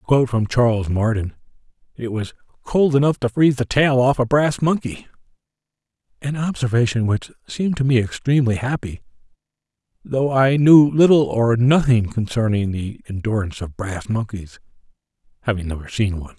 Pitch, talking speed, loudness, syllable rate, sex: 120 Hz, 145 wpm, -19 LUFS, 5.4 syllables/s, male